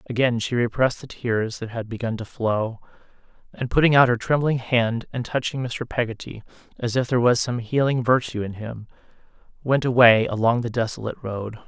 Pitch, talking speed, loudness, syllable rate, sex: 120 Hz, 180 wpm, -22 LUFS, 5.4 syllables/s, male